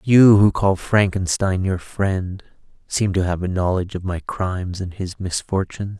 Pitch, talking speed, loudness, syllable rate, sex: 95 Hz, 170 wpm, -20 LUFS, 4.5 syllables/s, male